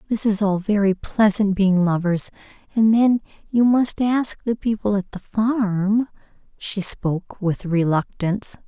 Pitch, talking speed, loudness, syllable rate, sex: 205 Hz, 140 wpm, -20 LUFS, 4.0 syllables/s, female